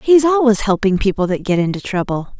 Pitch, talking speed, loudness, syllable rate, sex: 215 Hz, 200 wpm, -16 LUFS, 5.7 syllables/s, female